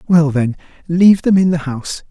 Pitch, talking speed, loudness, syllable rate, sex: 165 Hz, 200 wpm, -14 LUFS, 5.6 syllables/s, male